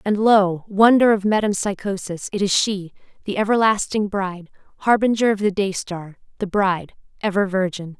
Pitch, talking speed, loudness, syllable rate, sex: 200 Hz, 145 wpm, -20 LUFS, 5.1 syllables/s, female